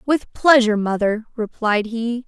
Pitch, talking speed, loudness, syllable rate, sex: 230 Hz, 130 wpm, -19 LUFS, 4.4 syllables/s, female